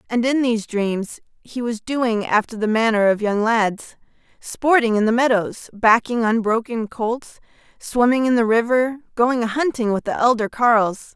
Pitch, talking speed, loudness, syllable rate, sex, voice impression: 230 Hz, 165 wpm, -19 LUFS, 4.5 syllables/s, female, very feminine, adult-like, slightly middle-aged, thin, very tensed, powerful, bright, very hard, very clear, fluent, slightly raspy, slightly cute, cool, intellectual, refreshing, slightly sincere, slightly calm, slightly friendly, slightly reassuring, very unique, slightly elegant, slightly wild, slightly sweet, slightly lively, strict, slightly intense, sharp